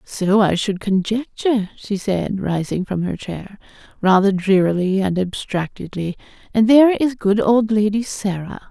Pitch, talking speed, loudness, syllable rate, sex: 205 Hz, 145 wpm, -18 LUFS, 4.4 syllables/s, female